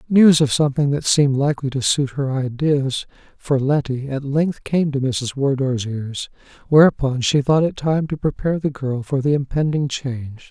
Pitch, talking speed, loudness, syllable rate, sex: 140 Hz, 185 wpm, -19 LUFS, 4.9 syllables/s, male